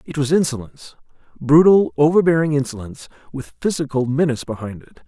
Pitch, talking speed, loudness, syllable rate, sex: 140 Hz, 120 wpm, -17 LUFS, 6.5 syllables/s, male